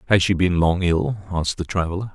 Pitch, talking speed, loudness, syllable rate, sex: 90 Hz, 225 wpm, -21 LUFS, 6.1 syllables/s, male